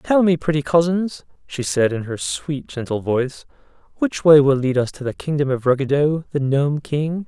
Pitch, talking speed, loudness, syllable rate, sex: 145 Hz, 200 wpm, -19 LUFS, 4.8 syllables/s, male